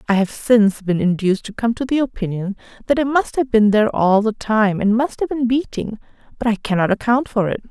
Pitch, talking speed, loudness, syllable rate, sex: 225 Hz, 235 wpm, -18 LUFS, 5.8 syllables/s, female